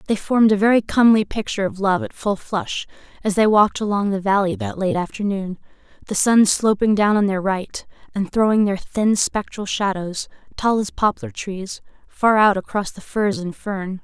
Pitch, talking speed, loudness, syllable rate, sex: 205 Hz, 190 wpm, -19 LUFS, 5.1 syllables/s, female